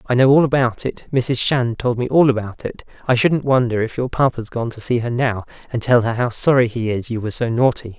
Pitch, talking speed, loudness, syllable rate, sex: 120 Hz, 255 wpm, -18 LUFS, 5.6 syllables/s, male